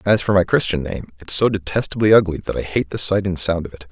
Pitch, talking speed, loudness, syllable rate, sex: 95 Hz, 275 wpm, -19 LUFS, 6.3 syllables/s, male